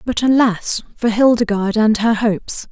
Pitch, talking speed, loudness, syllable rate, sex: 220 Hz, 155 wpm, -16 LUFS, 4.8 syllables/s, female